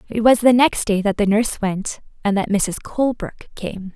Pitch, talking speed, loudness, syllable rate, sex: 215 Hz, 210 wpm, -19 LUFS, 5.2 syllables/s, female